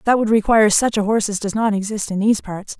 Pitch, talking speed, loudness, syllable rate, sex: 210 Hz, 280 wpm, -17 LUFS, 6.8 syllables/s, female